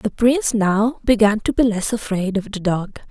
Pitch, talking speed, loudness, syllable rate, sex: 210 Hz, 215 wpm, -19 LUFS, 4.8 syllables/s, female